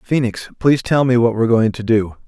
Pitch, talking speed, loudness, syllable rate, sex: 115 Hz, 240 wpm, -16 LUFS, 6.0 syllables/s, male